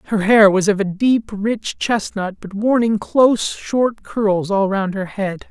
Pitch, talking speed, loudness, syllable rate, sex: 210 Hz, 195 wpm, -17 LUFS, 3.8 syllables/s, male